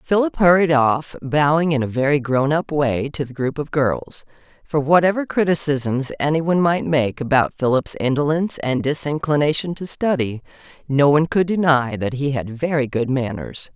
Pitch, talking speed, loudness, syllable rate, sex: 145 Hz, 170 wpm, -19 LUFS, 5.0 syllables/s, female